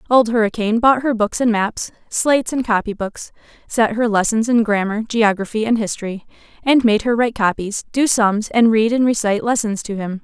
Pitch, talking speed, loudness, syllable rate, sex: 220 Hz, 195 wpm, -17 LUFS, 5.4 syllables/s, female